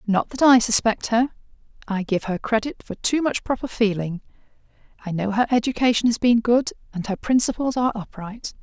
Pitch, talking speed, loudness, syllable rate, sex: 225 Hz, 175 wpm, -21 LUFS, 5.5 syllables/s, female